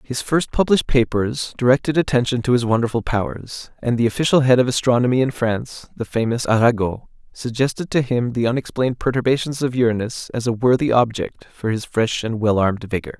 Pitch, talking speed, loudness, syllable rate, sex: 120 Hz, 180 wpm, -19 LUFS, 5.9 syllables/s, male